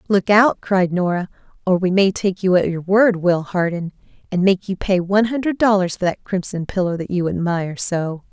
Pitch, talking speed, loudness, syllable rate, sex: 185 Hz, 210 wpm, -18 LUFS, 5.2 syllables/s, female